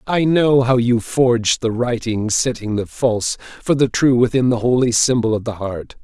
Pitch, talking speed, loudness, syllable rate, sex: 120 Hz, 200 wpm, -17 LUFS, 4.8 syllables/s, male